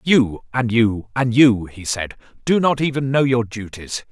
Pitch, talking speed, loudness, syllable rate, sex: 120 Hz, 190 wpm, -19 LUFS, 4.2 syllables/s, male